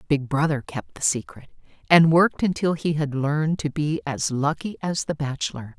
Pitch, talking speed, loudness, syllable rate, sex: 145 Hz, 185 wpm, -23 LUFS, 5.1 syllables/s, female